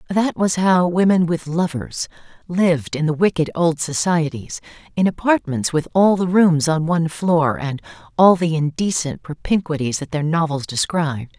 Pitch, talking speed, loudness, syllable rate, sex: 165 Hz, 160 wpm, -19 LUFS, 4.7 syllables/s, female